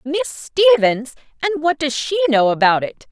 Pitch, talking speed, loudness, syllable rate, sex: 260 Hz, 175 wpm, -17 LUFS, 4.4 syllables/s, female